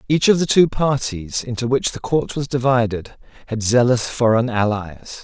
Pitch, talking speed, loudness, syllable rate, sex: 120 Hz, 170 wpm, -18 LUFS, 4.7 syllables/s, male